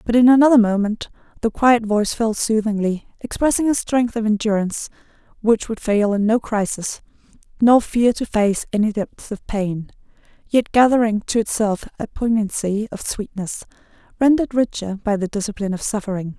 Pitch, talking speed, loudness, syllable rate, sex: 220 Hz, 155 wpm, -19 LUFS, 5.2 syllables/s, female